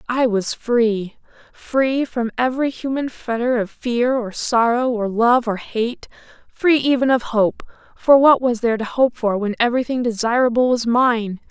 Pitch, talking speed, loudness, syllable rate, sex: 240 Hz, 155 wpm, -18 LUFS, 4.5 syllables/s, female